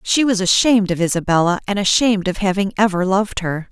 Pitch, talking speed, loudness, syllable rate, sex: 195 Hz, 195 wpm, -17 LUFS, 6.3 syllables/s, female